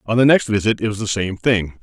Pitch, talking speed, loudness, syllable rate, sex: 110 Hz, 295 wpm, -18 LUFS, 5.9 syllables/s, male